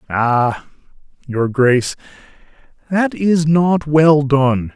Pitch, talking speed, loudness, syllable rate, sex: 145 Hz, 100 wpm, -15 LUFS, 3.0 syllables/s, male